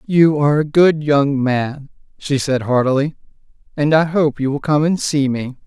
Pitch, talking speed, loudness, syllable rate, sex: 145 Hz, 190 wpm, -16 LUFS, 4.6 syllables/s, male